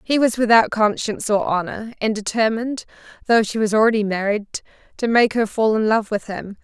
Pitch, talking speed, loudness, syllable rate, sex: 220 Hz, 190 wpm, -19 LUFS, 5.7 syllables/s, female